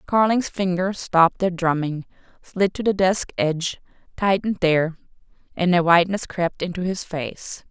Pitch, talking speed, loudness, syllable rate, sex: 180 Hz, 150 wpm, -21 LUFS, 4.9 syllables/s, female